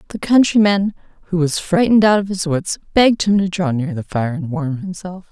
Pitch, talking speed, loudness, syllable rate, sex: 195 Hz, 215 wpm, -17 LUFS, 5.5 syllables/s, female